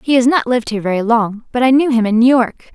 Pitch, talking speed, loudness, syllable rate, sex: 240 Hz, 305 wpm, -14 LUFS, 6.6 syllables/s, female